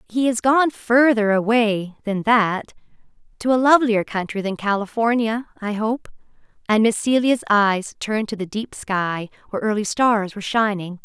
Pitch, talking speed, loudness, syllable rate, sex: 220 Hz, 160 wpm, -20 LUFS, 4.7 syllables/s, female